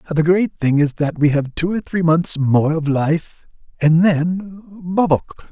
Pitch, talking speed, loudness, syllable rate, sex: 165 Hz, 175 wpm, -17 LUFS, 3.6 syllables/s, male